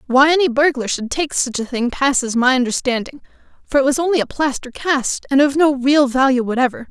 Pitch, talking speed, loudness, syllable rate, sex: 270 Hz, 210 wpm, -17 LUFS, 5.6 syllables/s, female